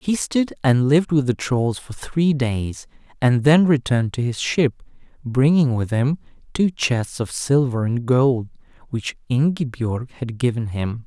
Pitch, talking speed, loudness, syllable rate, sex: 130 Hz, 165 wpm, -20 LUFS, 4.2 syllables/s, male